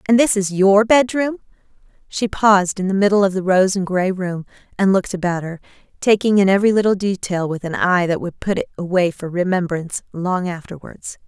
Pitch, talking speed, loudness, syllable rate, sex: 190 Hz, 195 wpm, -18 LUFS, 5.6 syllables/s, female